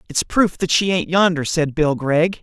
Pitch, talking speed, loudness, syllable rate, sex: 165 Hz, 220 wpm, -18 LUFS, 4.4 syllables/s, male